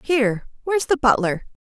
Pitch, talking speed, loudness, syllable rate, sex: 255 Hz, 145 wpm, -21 LUFS, 6.0 syllables/s, female